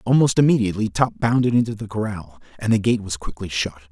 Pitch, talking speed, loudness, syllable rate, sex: 105 Hz, 200 wpm, -21 LUFS, 6.3 syllables/s, male